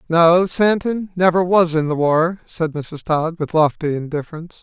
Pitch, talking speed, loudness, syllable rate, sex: 165 Hz, 170 wpm, -18 LUFS, 4.6 syllables/s, male